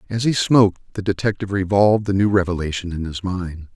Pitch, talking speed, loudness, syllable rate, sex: 95 Hz, 190 wpm, -19 LUFS, 6.3 syllables/s, male